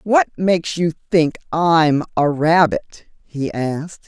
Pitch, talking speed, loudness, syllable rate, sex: 165 Hz, 130 wpm, -18 LUFS, 3.8 syllables/s, female